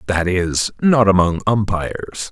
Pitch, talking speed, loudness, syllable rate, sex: 95 Hz, 130 wpm, -17 LUFS, 4.1 syllables/s, male